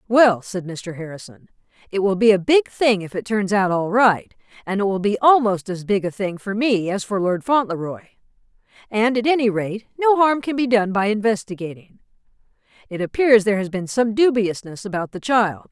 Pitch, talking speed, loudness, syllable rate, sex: 205 Hz, 200 wpm, -19 LUFS, 5.1 syllables/s, female